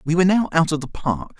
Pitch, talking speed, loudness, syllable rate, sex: 165 Hz, 300 wpm, -20 LUFS, 6.4 syllables/s, male